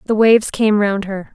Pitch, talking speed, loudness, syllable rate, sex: 210 Hz, 225 wpm, -15 LUFS, 5.1 syllables/s, female